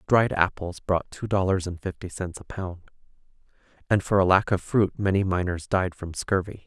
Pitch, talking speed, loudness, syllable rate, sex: 95 Hz, 180 wpm, -25 LUFS, 4.8 syllables/s, male